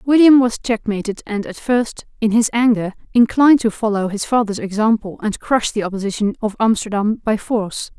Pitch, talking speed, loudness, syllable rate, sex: 220 Hz, 175 wpm, -17 LUFS, 5.4 syllables/s, female